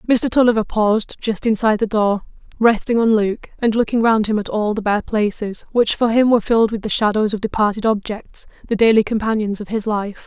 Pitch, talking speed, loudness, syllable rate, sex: 215 Hz, 205 wpm, -18 LUFS, 5.7 syllables/s, female